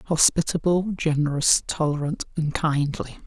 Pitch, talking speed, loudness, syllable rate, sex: 155 Hz, 90 wpm, -23 LUFS, 4.4 syllables/s, male